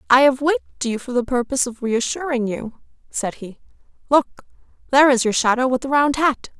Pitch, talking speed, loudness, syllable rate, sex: 255 Hz, 190 wpm, -19 LUFS, 5.5 syllables/s, female